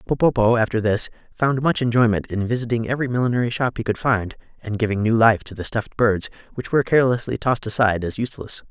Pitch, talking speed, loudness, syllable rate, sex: 115 Hz, 200 wpm, -20 LUFS, 6.7 syllables/s, male